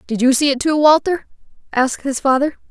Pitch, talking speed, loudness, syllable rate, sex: 275 Hz, 200 wpm, -16 LUFS, 5.9 syllables/s, female